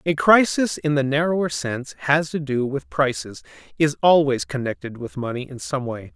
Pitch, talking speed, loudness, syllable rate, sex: 140 Hz, 175 wpm, -21 LUFS, 5.0 syllables/s, male